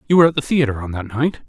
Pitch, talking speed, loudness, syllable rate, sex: 135 Hz, 325 wpm, -18 LUFS, 8.0 syllables/s, male